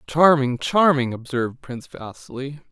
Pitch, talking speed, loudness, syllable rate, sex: 135 Hz, 110 wpm, -19 LUFS, 4.7 syllables/s, male